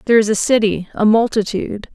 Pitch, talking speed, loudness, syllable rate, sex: 215 Hz, 185 wpm, -16 LUFS, 6.8 syllables/s, female